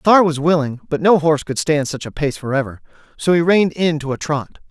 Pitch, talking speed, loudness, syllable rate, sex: 155 Hz, 240 wpm, -17 LUFS, 5.9 syllables/s, male